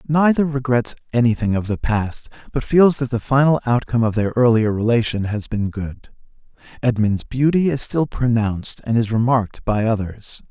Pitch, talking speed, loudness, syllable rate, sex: 120 Hz, 165 wpm, -19 LUFS, 5.0 syllables/s, male